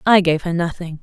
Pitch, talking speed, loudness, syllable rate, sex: 170 Hz, 235 wpm, -18 LUFS, 5.6 syllables/s, female